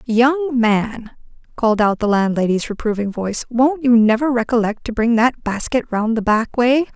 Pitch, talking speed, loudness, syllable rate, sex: 235 Hz, 175 wpm, -17 LUFS, 4.9 syllables/s, female